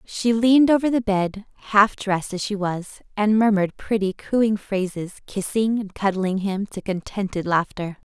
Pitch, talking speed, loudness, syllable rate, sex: 205 Hz, 165 wpm, -22 LUFS, 4.7 syllables/s, female